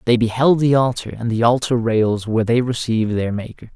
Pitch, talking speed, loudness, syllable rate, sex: 115 Hz, 210 wpm, -18 LUFS, 5.6 syllables/s, male